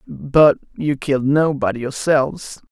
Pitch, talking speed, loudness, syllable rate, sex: 140 Hz, 110 wpm, -18 LUFS, 4.3 syllables/s, male